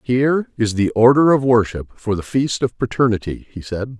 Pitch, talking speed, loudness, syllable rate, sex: 115 Hz, 195 wpm, -18 LUFS, 5.1 syllables/s, male